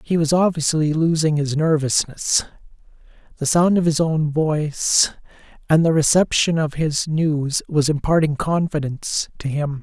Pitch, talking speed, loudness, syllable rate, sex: 155 Hz, 140 wpm, -19 LUFS, 4.5 syllables/s, male